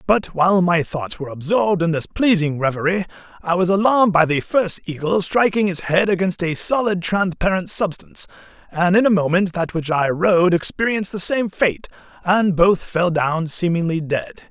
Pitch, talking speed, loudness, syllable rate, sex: 180 Hz, 180 wpm, -18 LUFS, 5.1 syllables/s, male